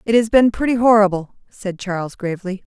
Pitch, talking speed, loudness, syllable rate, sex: 205 Hz, 175 wpm, -17 LUFS, 5.8 syllables/s, female